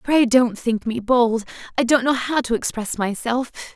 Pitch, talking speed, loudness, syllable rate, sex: 240 Hz, 190 wpm, -20 LUFS, 4.5 syllables/s, female